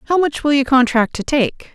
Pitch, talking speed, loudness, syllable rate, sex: 265 Hz, 240 wpm, -16 LUFS, 4.7 syllables/s, female